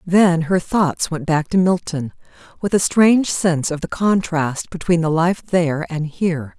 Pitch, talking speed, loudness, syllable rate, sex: 170 Hz, 180 wpm, -18 LUFS, 4.5 syllables/s, female